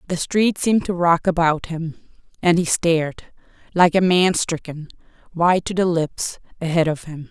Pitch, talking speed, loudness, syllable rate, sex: 170 Hz, 165 wpm, -19 LUFS, 4.8 syllables/s, female